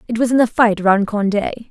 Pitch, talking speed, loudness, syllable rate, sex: 220 Hz, 245 wpm, -16 LUFS, 5.7 syllables/s, female